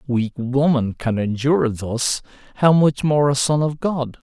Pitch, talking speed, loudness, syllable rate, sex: 135 Hz, 180 wpm, -19 LUFS, 4.3 syllables/s, male